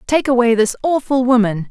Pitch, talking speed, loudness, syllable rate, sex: 240 Hz, 175 wpm, -15 LUFS, 5.4 syllables/s, female